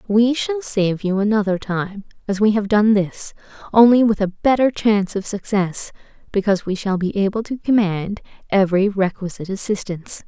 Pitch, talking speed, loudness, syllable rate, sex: 205 Hz, 165 wpm, -19 LUFS, 5.2 syllables/s, female